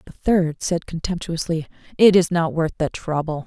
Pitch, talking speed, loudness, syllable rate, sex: 165 Hz, 190 wpm, -21 LUFS, 5.0 syllables/s, female